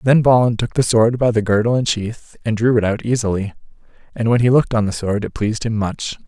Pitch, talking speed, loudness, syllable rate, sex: 115 Hz, 250 wpm, -17 LUFS, 5.9 syllables/s, male